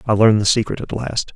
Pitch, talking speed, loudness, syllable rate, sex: 110 Hz, 265 wpm, -17 LUFS, 5.9 syllables/s, male